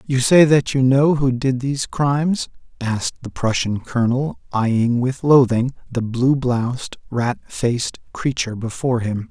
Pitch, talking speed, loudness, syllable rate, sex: 125 Hz, 155 wpm, -19 LUFS, 4.5 syllables/s, male